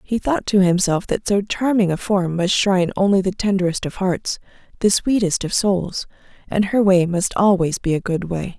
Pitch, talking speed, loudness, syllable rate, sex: 190 Hz, 205 wpm, -19 LUFS, 4.9 syllables/s, female